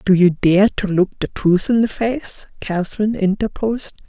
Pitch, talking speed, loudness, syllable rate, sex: 200 Hz, 175 wpm, -18 LUFS, 5.0 syllables/s, female